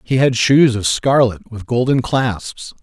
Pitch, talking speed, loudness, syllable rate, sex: 120 Hz, 170 wpm, -15 LUFS, 3.8 syllables/s, male